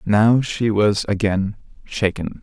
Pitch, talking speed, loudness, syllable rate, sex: 105 Hz, 125 wpm, -19 LUFS, 3.7 syllables/s, male